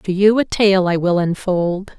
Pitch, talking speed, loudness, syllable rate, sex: 190 Hz, 210 wpm, -16 LUFS, 4.1 syllables/s, female